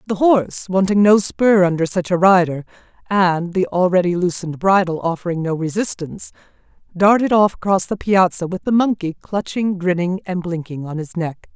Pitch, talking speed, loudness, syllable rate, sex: 185 Hz, 165 wpm, -17 LUFS, 5.2 syllables/s, female